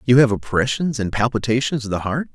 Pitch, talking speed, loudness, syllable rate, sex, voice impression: 120 Hz, 205 wpm, -20 LUFS, 5.9 syllables/s, male, very masculine, very adult-like, very middle-aged, slightly relaxed, powerful, slightly bright, slightly soft, slightly muffled, slightly fluent, slightly raspy, cool, very intellectual, slightly refreshing, sincere, very calm, mature, friendly, reassuring, unique, slightly elegant, slightly wild, sweet, lively, kind